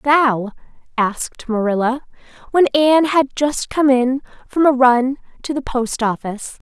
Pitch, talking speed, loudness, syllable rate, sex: 260 Hz, 145 wpm, -17 LUFS, 4.4 syllables/s, female